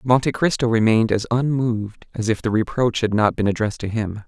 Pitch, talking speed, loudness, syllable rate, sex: 115 Hz, 210 wpm, -20 LUFS, 5.9 syllables/s, male